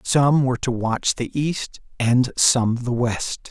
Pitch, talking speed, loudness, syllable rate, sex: 125 Hz, 170 wpm, -21 LUFS, 3.5 syllables/s, male